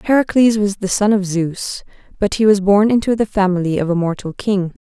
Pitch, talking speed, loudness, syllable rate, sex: 200 Hz, 210 wpm, -16 LUFS, 5.4 syllables/s, female